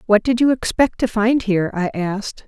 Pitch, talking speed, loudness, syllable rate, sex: 220 Hz, 220 wpm, -18 LUFS, 5.2 syllables/s, female